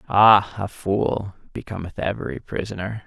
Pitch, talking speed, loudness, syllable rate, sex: 100 Hz, 115 wpm, -22 LUFS, 4.5 syllables/s, male